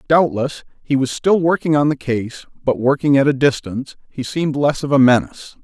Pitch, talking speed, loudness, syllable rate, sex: 140 Hz, 200 wpm, -17 LUFS, 5.5 syllables/s, male